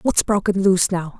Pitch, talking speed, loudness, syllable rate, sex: 190 Hz, 200 wpm, -18 LUFS, 5.6 syllables/s, female